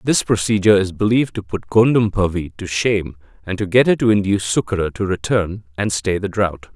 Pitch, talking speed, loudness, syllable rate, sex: 100 Hz, 195 wpm, -18 LUFS, 5.8 syllables/s, male